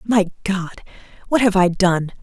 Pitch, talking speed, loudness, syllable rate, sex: 195 Hz, 160 wpm, -18 LUFS, 4.7 syllables/s, female